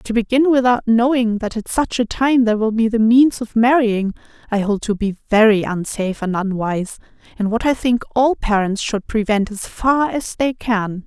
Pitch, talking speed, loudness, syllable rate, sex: 225 Hz, 200 wpm, -17 LUFS, 4.9 syllables/s, female